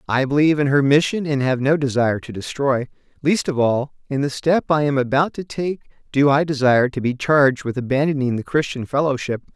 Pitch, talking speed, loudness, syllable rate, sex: 140 Hz, 205 wpm, -19 LUFS, 5.8 syllables/s, male